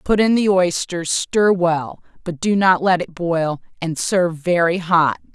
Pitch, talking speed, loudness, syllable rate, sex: 175 Hz, 180 wpm, -18 LUFS, 4.0 syllables/s, female